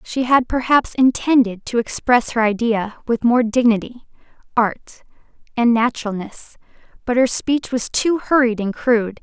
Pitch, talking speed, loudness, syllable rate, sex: 235 Hz, 145 wpm, -18 LUFS, 4.6 syllables/s, female